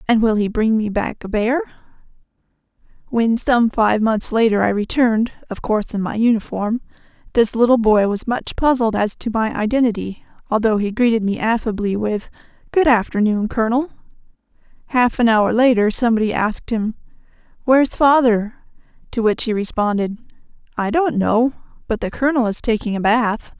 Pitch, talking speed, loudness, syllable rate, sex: 225 Hz, 160 wpm, -18 LUFS, 5.3 syllables/s, female